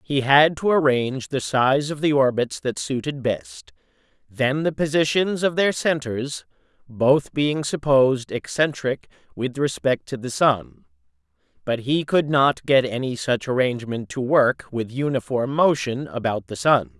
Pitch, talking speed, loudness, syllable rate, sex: 130 Hz, 150 wpm, -21 LUFS, 4.3 syllables/s, male